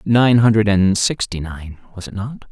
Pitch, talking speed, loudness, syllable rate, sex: 105 Hz, 240 wpm, -16 LUFS, 5.8 syllables/s, male